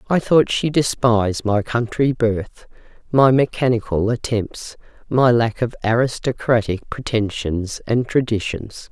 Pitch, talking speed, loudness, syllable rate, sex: 115 Hz, 115 wpm, -19 LUFS, 4.1 syllables/s, female